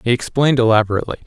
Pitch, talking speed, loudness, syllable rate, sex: 120 Hz, 140 wpm, -16 LUFS, 8.6 syllables/s, male